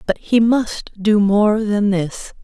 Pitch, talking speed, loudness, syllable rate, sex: 210 Hz, 170 wpm, -17 LUFS, 3.2 syllables/s, female